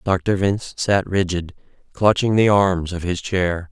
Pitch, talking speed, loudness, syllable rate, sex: 95 Hz, 160 wpm, -19 LUFS, 4.1 syllables/s, male